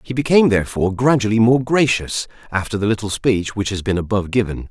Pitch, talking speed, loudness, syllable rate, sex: 110 Hz, 190 wpm, -18 LUFS, 6.4 syllables/s, male